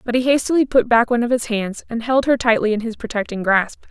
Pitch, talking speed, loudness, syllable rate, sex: 235 Hz, 260 wpm, -18 LUFS, 6.2 syllables/s, female